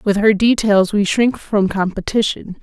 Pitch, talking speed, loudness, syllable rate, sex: 205 Hz, 160 wpm, -16 LUFS, 4.4 syllables/s, female